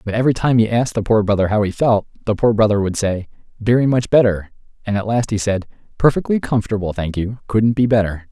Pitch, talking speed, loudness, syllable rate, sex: 110 Hz, 225 wpm, -17 LUFS, 6.3 syllables/s, male